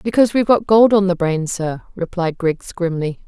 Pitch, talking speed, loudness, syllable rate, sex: 185 Hz, 200 wpm, -17 LUFS, 5.2 syllables/s, female